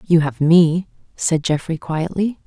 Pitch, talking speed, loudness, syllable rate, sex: 165 Hz, 145 wpm, -18 LUFS, 4.0 syllables/s, female